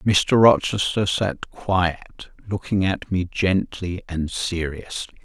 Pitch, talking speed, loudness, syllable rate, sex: 95 Hz, 115 wpm, -22 LUFS, 3.3 syllables/s, male